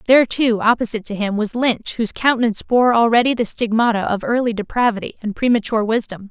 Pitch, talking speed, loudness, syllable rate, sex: 225 Hz, 180 wpm, -18 LUFS, 6.4 syllables/s, female